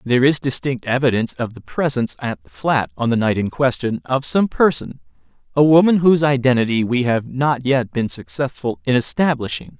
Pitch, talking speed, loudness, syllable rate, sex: 130 Hz, 180 wpm, -18 LUFS, 5.5 syllables/s, male